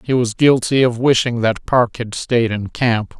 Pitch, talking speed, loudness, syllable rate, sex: 120 Hz, 205 wpm, -16 LUFS, 4.2 syllables/s, male